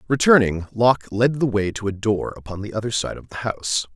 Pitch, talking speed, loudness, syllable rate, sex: 110 Hz, 230 wpm, -21 LUFS, 5.8 syllables/s, male